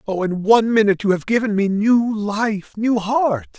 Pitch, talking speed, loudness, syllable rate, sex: 210 Hz, 200 wpm, -18 LUFS, 4.8 syllables/s, male